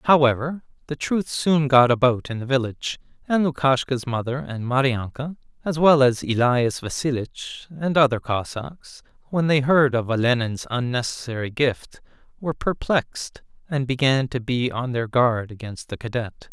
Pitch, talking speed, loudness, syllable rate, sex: 130 Hz, 150 wpm, -22 LUFS, 4.6 syllables/s, male